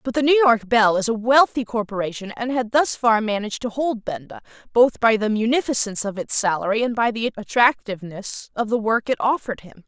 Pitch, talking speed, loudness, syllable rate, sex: 225 Hz, 205 wpm, -20 LUFS, 5.7 syllables/s, female